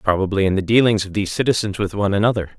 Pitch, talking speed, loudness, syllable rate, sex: 100 Hz, 230 wpm, -18 LUFS, 7.9 syllables/s, male